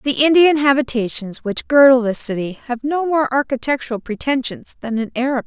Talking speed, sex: 175 wpm, female